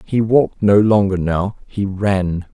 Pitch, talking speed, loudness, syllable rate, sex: 100 Hz, 160 wpm, -16 LUFS, 3.9 syllables/s, male